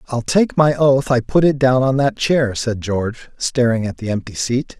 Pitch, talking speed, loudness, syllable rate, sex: 125 Hz, 225 wpm, -17 LUFS, 4.7 syllables/s, male